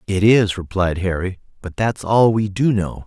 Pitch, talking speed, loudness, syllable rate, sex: 100 Hz, 195 wpm, -18 LUFS, 4.5 syllables/s, male